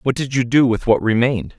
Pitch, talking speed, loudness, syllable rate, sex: 120 Hz, 265 wpm, -17 LUFS, 6.0 syllables/s, male